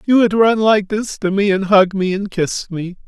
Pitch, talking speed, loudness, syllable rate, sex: 200 Hz, 255 wpm, -16 LUFS, 4.5 syllables/s, male